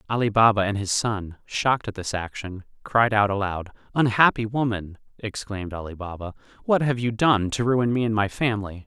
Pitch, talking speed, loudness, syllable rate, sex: 105 Hz, 185 wpm, -23 LUFS, 5.4 syllables/s, male